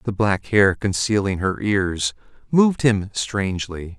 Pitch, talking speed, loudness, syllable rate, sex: 100 Hz, 135 wpm, -20 LUFS, 4.0 syllables/s, male